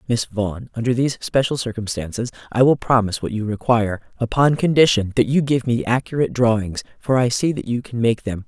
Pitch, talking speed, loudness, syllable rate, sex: 120 Hz, 200 wpm, -20 LUFS, 6.0 syllables/s, female